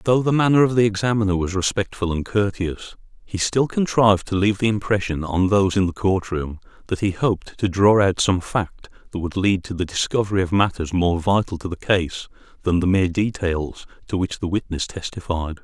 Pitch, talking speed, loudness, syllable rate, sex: 95 Hz, 205 wpm, -21 LUFS, 5.5 syllables/s, male